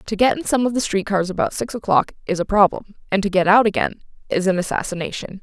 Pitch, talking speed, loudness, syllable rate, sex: 200 Hz, 245 wpm, -19 LUFS, 6.3 syllables/s, female